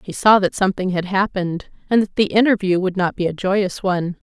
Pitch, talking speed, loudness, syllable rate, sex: 190 Hz, 225 wpm, -18 LUFS, 5.8 syllables/s, female